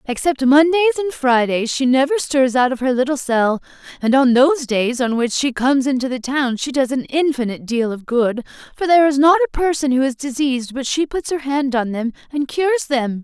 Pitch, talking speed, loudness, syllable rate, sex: 270 Hz, 220 wpm, -17 LUFS, 5.5 syllables/s, female